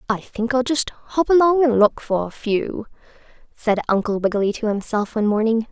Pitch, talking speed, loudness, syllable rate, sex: 230 Hz, 190 wpm, -20 LUFS, 5.2 syllables/s, female